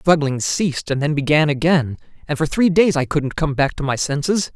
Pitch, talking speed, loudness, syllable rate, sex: 150 Hz, 235 wpm, -18 LUFS, 5.5 syllables/s, male